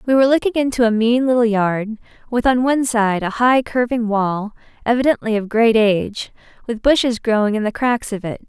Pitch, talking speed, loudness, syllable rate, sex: 230 Hz, 200 wpm, -17 LUFS, 5.5 syllables/s, female